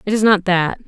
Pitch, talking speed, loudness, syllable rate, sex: 195 Hz, 275 wpm, -16 LUFS, 5.4 syllables/s, female